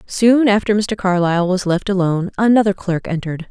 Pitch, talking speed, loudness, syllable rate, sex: 195 Hz, 170 wpm, -16 LUFS, 5.7 syllables/s, female